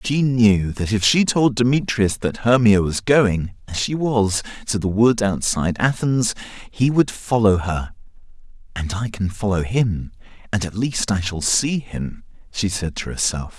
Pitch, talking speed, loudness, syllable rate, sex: 110 Hz, 170 wpm, -20 LUFS, 4.2 syllables/s, male